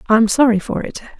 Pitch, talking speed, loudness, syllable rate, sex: 230 Hz, 250 wpm, -16 LUFS, 7.0 syllables/s, female